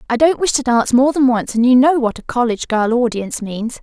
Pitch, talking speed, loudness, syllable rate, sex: 245 Hz, 265 wpm, -15 LUFS, 6.1 syllables/s, female